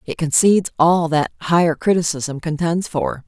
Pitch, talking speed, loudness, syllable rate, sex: 160 Hz, 145 wpm, -18 LUFS, 4.8 syllables/s, female